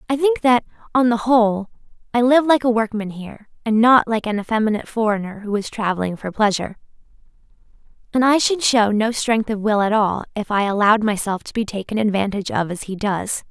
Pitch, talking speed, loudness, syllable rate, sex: 220 Hz, 200 wpm, -19 LUFS, 5.9 syllables/s, female